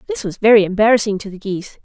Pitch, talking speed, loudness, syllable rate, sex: 210 Hz, 230 wpm, -16 LUFS, 7.8 syllables/s, female